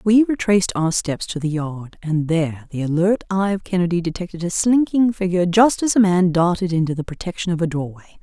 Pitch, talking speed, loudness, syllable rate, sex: 180 Hz, 210 wpm, -19 LUFS, 5.7 syllables/s, female